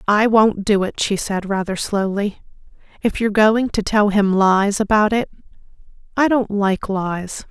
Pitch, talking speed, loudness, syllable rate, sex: 205 Hz, 170 wpm, -18 LUFS, 4.4 syllables/s, female